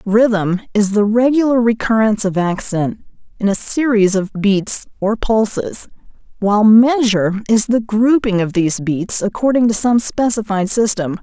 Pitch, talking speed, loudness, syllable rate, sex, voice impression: 215 Hz, 145 wpm, -15 LUFS, 4.6 syllables/s, female, feminine, very adult-like, slightly intellectual, slightly unique, slightly elegant